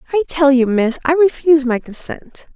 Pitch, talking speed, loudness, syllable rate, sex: 285 Hz, 190 wpm, -15 LUFS, 5.3 syllables/s, female